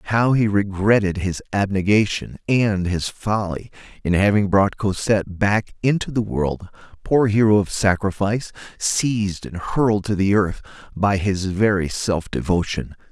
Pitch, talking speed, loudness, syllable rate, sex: 100 Hz, 140 wpm, -20 LUFS, 4.4 syllables/s, male